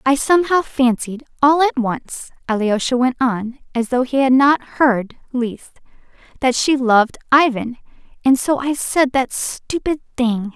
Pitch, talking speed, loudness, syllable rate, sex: 260 Hz, 155 wpm, -17 LUFS, 4.2 syllables/s, female